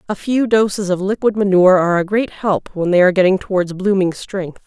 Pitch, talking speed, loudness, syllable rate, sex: 195 Hz, 220 wpm, -16 LUFS, 5.8 syllables/s, female